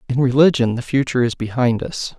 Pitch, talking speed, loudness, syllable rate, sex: 125 Hz, 190 wpm, -18 LUFS, 6.0 syllables/s, male